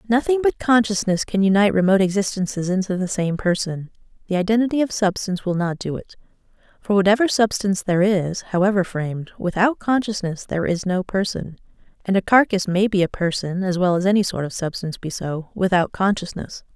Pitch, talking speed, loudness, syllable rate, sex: 195 Hz, 180 wpm, -20 LUFS, 5.9 syllables/s, female